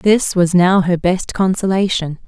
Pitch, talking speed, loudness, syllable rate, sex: 185 Hz, 160 wpm, -15 LUFS, 4.1 syllables/s, female